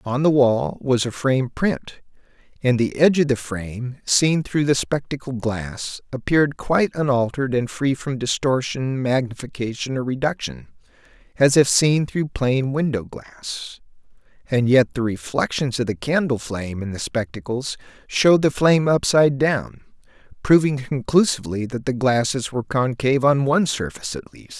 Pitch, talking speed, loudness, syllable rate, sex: 130 Hz, 155 wpm, -21 LUFS, 4.9 syllables/s, male